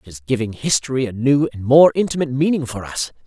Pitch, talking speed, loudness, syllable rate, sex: 130 Hz, 220 wpm, -18 LUFS, 6.3 syllables/s, male